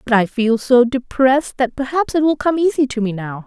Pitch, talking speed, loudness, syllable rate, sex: 255 Hz, 240 wpm, -17 LUFS, 5.3 syllables/s, female